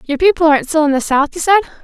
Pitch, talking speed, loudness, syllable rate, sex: 310 Hz, 295 wpm, -13 LUFS, 7.5 syllables/s, female